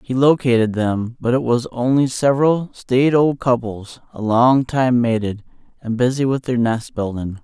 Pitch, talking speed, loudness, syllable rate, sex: 125 Hz, 170 wpm, -18 LUFS, 4.4 syllables/s, male